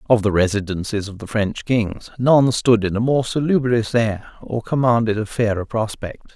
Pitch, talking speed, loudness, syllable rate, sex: 110 Hz, 180 wpm, -19 LUFS, 4.7 syllables/s, male